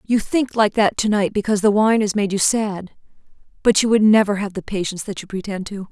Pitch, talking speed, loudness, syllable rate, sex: 205 Hz, 245 wpm, -19 LUFS, 5.8 syllables/s, female